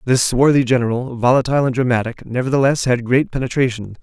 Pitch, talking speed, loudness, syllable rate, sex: 125 Hz, 150 wpm, -17 LUFS, 6.3 syllables/s, male